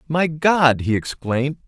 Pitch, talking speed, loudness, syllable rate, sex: 145 Hz, 145 wpm, -19 LUFS, 4.2 syllables/s, male